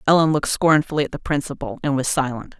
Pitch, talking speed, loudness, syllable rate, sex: 145 Hz, 210 wpm, -20 LUFS, 7.0 syllables/s, female